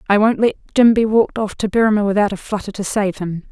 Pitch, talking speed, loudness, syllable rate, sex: 205 Hz, 255 wpm, -17 LUFS, 6.5 syllables/s, female